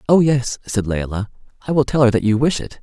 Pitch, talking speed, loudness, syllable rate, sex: 125 Hz, 255 wpm, -18 LUFS, 5.9 syllables/s, male